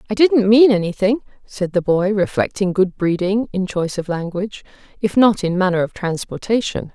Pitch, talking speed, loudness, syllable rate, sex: 195 Hz, 175 wpm, -18 LUFS, 5.3 syllables/s, female